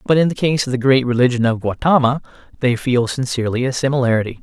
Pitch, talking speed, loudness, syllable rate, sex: 125 Hz, 205 wpm, -17 LUFS, 6.6 syllables/s, male